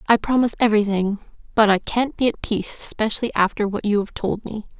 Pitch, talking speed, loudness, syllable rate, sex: 215 Hz, 200 wpm, -21 LUFS, 6.3 syllables/s, female